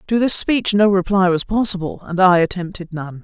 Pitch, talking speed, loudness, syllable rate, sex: 185 Hz, 205 wpm, -17 LUFS, 5.2 syllables/s, female